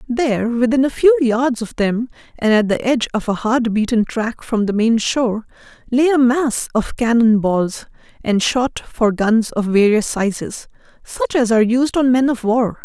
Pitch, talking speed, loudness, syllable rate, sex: 235 Hz, 190 wpm, -17 LUFS, 4.5 syllables/s, female